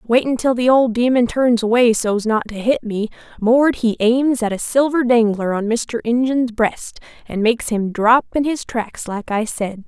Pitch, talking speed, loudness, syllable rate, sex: 235 Hz, 200 wpm, -17 LUFS, 4.4 syllables/s, female